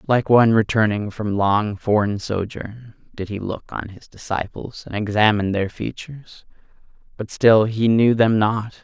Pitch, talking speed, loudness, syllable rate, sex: 110 Hz, 155 wpm, -19 LUFS, 4.5 syllables/s, male